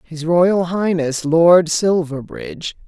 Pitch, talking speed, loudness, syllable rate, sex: 170 Hz, 105 wpm, -16 LUFS, 3.4 syllables/s, female